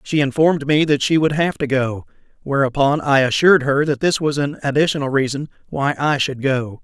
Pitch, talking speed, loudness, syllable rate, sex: 140 Hz, 200 wpm, -18 LUFS, 5.4 syllables/s, male